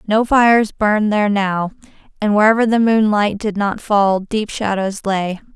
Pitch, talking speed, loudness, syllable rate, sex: 210 Hz, 160 wpm, -16 LUFS, 4.6 syllables/s, female